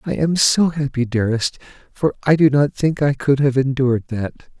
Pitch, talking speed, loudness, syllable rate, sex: 140 Hz, 195 wpm, -18 LUFS, 5.3 syllables/s, male